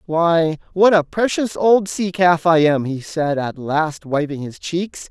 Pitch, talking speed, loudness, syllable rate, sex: 165 Hz, 190 wpm, -18 LUFS, 3.7 syllables/s, male